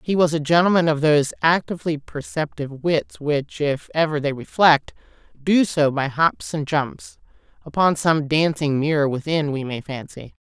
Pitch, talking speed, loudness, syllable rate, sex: 155 Hz, 160 wpm, -20 LUFS, 4.7 syllables/s, female